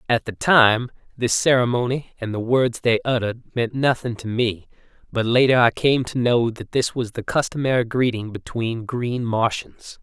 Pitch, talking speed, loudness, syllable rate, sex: 120 Hz, 175 wpm, -21 LUFS, 4.6 syllables/s, male